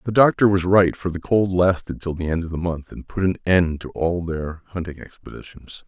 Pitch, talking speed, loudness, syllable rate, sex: 90 Hz, 235 wpm, -21 LUFS, 5.3 syllables/s, male